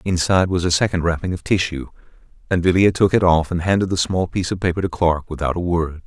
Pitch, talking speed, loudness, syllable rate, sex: 85 Hz, 240 wpm, -19 LUFS, 6.5 syllables/s, male